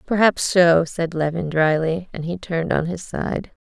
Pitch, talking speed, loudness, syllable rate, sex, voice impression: 170 Hz, 180 wpm, -20 LUFS, 4.4 syllables/s, female, very feminine, adult-like, slightly intellectual, slightly calm, slightly sweet